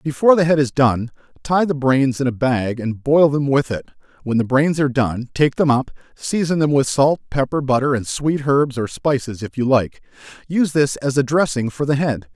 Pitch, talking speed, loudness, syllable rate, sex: 135 Hz, 220 wpm, -18 LUFS, 5.1 syllables/s, male